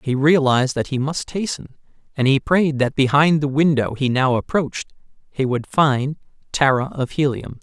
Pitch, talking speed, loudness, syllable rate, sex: 140 Hz, 175 wpm, -19 LUFS, 4.9 syllables/s, male